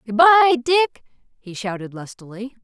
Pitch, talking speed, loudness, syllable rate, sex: 250 Hz, 135 wpm, -17 LUFS, 6.5 syllables/s, female